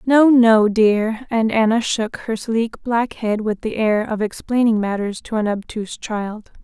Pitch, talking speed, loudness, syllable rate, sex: 220 Hz, 180 wpm, -18 LUFS, 4.1 syllables/s, female